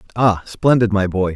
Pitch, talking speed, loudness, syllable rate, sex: 105 Hz, 175 wpm, -17 LUFS, 4.8 syllables/s, male